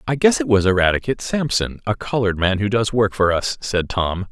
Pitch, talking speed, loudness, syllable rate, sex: 105 Hz, 220 wpm, -19 LUFS, 5.7 syllables/s, male